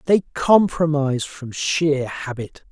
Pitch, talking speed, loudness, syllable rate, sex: 150 Hz, 110 wpm, -20 LUFS, 3.6 syllables/s, male